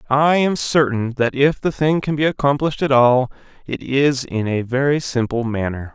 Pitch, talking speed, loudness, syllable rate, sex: 135 Hz, 190 wpm, -18 LUFS, 4.8 syllables/s, male